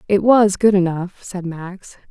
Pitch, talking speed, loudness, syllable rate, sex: 190 Hz, 170 wpm, -17 LUFS, 3.9 syllables/s, female